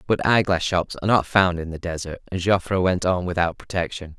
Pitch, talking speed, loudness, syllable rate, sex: 90 Hz, 215 wpm, -22 LUFS, 5.5 syllables/s, male